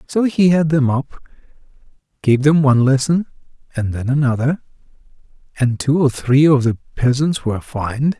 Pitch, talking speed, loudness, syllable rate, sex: 135 Hz, 155 wpm, -17 LUFS, 5.2 syllables/s, male